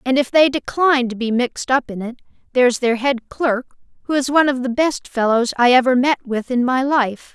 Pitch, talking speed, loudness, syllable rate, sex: 255 Hz, 230 wpm, -18 LUFS, 5.4 syllables/s, female